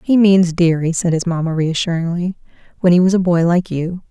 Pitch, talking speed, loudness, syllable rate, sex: 175 Hz, 205 wpm, -16 LUFS, 5.4 syllables/s, female